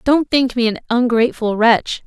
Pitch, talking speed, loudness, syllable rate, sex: 240 Hz, 175 wpm, -16 LUFS, 4.8 syllables/s, female